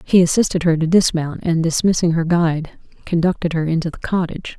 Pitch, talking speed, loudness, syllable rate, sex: 170 Hz, 185 wpm, -18 LUFS, 5.9 syllables/s, female